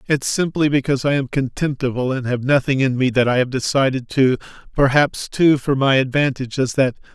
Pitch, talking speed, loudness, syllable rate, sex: 135 Hz, 195 wpm, -18 LUFS, 5.6 syllables/s, male